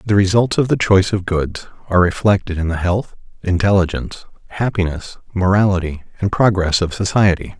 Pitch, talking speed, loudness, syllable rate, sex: 95 Hz, 150 wpm, -17 LUFS, 5.7 syllables/s, male